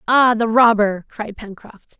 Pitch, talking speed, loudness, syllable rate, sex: 220 Hz, 150 wpm, -15 LUFS, 3.9 syllables/s, female